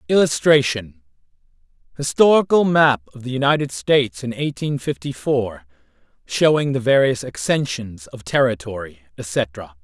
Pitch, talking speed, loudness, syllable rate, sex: 140 Hz, 110 wpm, -19 LUFS, 4.6 syllables/s, male